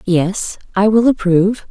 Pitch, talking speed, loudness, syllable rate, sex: 200 Hz, 105 wpm, -15 LUFS, 4.2 syllables/s, female